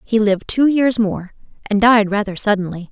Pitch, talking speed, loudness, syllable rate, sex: 210 Hz, 185 wpm, -16 LUFS, 5.2 syllables/s, female